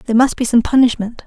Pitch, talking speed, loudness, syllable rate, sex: 240 Hz, 235 wpm, -15 LUFS, 7.2 syllables/s, female